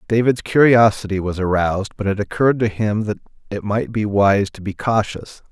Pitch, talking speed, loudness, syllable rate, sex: 105 Hz, 185 wpm, -18 LUFS, 5.2 syllables/s, male